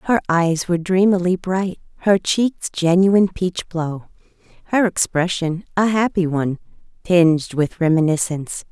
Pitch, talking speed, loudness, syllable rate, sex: 175 Hz, 115 wpm, -18 LUFS, 4.5 syllables/s, female